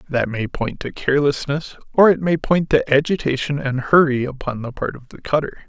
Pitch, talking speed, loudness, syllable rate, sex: 140 Hz, 200 wpm, -19 LUFS, 5.3 syllables/s, male